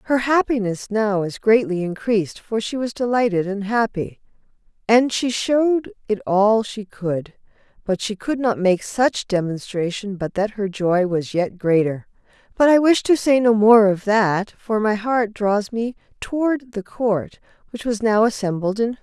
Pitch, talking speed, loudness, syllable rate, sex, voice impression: 215 Hz, 175 wpm, -20 LUFS, 4.5 syllables/s, female, feminine, adult-like, tensed, powerful, bright, clear, intellectual, friendly, elegant, lively, kind